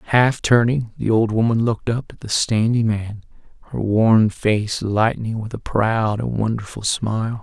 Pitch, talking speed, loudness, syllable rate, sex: 110 Hz, 170 wpm, -19 LUFS, 4.4 syllables/s, male